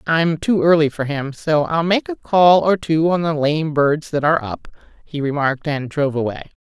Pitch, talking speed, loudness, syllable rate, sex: 155 Hz, 215 wpm, -18 LUFS, 5.0 syllables/s, female